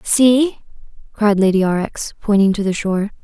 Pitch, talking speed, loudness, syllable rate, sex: 210 Hz, 150 wpm, -16 LUFS, 5.0 syllables/s, female